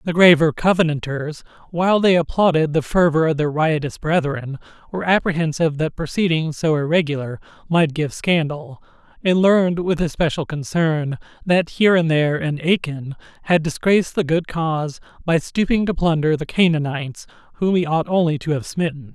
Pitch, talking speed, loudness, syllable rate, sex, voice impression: 160 Hz, 155 wpm, -19 LUFS, 5.3 syllables/s, male, masculine, adult-like, slightly muffled, friendly, unique, slightly kind